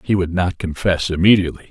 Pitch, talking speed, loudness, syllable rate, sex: 90 Hz, 175 wpm, -17 LUFS, 6.3 syllables/s, male